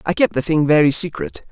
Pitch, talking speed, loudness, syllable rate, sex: 160 Hz, 240 wpm, -16 LUFS, 6.0 syllables/s, male